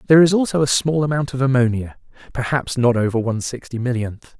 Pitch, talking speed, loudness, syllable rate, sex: 130 Hz, 190 wpm, -19 LUFS, 6.2 syllables/s, male